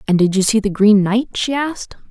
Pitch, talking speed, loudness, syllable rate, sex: 215 Hz, 255 wpm, -16 LUFS, 5.7 syllables/s, female